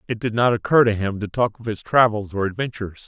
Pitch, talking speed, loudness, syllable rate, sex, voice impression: 110 Hz, 255 wpm, -20 LUFS, 6.2 syllables/s, male, very masculine, very middle-aged, very thick, tensed, very powerful, bright, soft, muffled, fluent, slightly raspy, cool, very intellectual, refreshing, sincere, very calm, very mature, very friendly, reassuring, unique, elegant, very wild, sweet, lively, kind, slightly intense